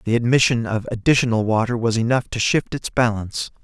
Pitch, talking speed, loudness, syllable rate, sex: 115 Hz, 180 wpm, -20 LUFS, 5.9 syllables/s, male